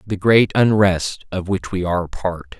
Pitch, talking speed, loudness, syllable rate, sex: 95 Hz, 185 wpm, -18 LUFS, 4.1 syllables/s, male